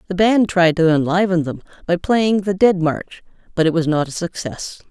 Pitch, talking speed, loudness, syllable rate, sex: 175 Hz, 210 wpm, -17 LUFS, 4.9 syllables/s, female